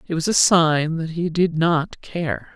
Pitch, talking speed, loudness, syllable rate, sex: 165 Hz, 210 wpm, -20 LUFS, 3.7 syllables/s, female